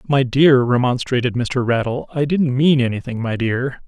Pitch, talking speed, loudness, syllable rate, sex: 130 Hz, 170 wpm, -18 LUFS, 4.7 syllables/s, male